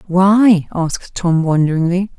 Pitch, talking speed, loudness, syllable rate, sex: 180 Hz, 110 wpm, -14 LUFS, 4.2 syllables/s, female